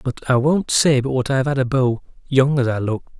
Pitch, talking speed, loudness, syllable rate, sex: 130 Hz, 265 wpm, -18 LUFS, 5.5 syllables/s, male